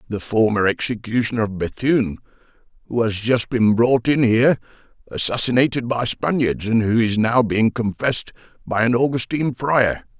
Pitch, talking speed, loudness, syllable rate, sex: 115 Hz, 145 wpm, -19 LUFS, 5.1 syllables/s, male